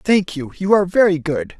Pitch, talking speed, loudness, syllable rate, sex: 175 Hz, 225 wpm, -17 LUFS, 5.3 syllables/s, male